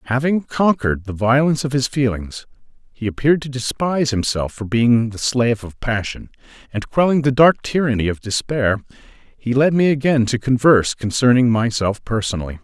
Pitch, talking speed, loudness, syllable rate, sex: 125 Hz, 160 wpm, -18 LUFS, 5.4 syllables/s, male